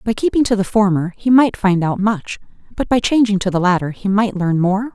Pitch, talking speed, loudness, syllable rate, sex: 205 Hz, 240 wpm, -16 LUFS, 5.4 syllables/s, female